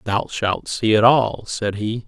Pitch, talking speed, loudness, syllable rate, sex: 110 Hz, 200 wpm, -19 LUFS, 3.7 syllables/s, male